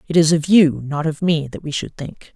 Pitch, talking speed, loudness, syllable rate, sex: 155 Hz, 280 wpm, -18 LUFS, 5.0 syllables/s, female